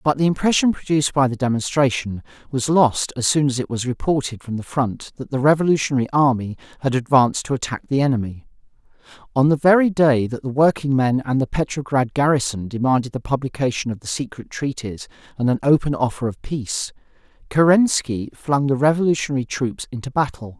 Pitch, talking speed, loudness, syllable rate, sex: 130 Hz, 170 wpm, -20 LUFS, 5.8 syllables/s, male